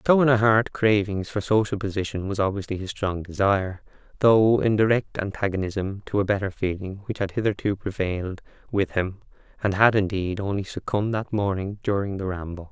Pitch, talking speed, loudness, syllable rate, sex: 100 Hz, 180 wpm, -24 LUFS, 5.5 syllables/s, male